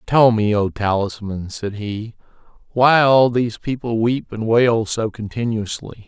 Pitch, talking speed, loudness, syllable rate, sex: 115 Hz, 150 wpm, -19 LUFS, 4.1 syllables/s, male